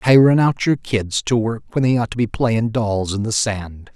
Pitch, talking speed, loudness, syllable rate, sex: 115 Hz, 245 wpm, -18 LUFS, 4.6 syllables/s, male